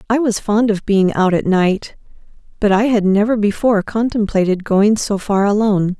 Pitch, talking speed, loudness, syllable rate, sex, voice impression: 205 Hz, 180 wpm, -15 LUFS, 5.0 syllables/s, female, very feminine, very adult-like, thin, tensed, slightly weak, slightly dark, slightly hard, clear, fluent, slightly raspy, slightly cute, cool, intellectual, refreshing, very sincere, very calm, friendly, reassuring, slightly unique, elegant, slightly wild, slightly sweet, slightly lively, kind, modest, slightly light